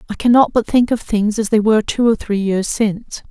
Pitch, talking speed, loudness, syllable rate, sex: 215 Hz, 255 wpm, -16 LUFS, 5.5 syllables/s, female